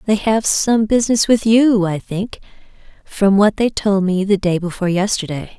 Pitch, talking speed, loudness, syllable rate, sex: 205 Hz, 185 wpm, -16 LUFS, 4.8 syllables/s, female